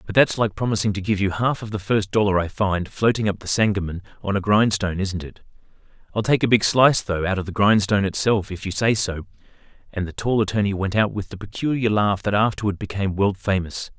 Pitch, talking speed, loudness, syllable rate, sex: 100 Hz, 225 wpm, -21 LUFS, 6.0 syllables/s, male